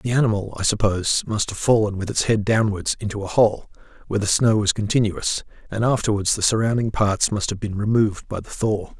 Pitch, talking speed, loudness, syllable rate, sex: 105 Hz, 205 wpm, -21 LUFS, 5.6 syllables/s, male